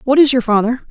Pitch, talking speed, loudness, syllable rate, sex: 250 Hz, 265 wpm, -13 LUFS, 6.6 syllables/s, female